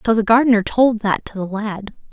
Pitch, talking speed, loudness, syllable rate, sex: 215 Hz, 225 wpm, -17 LUFS, 5.4 syllables/s, female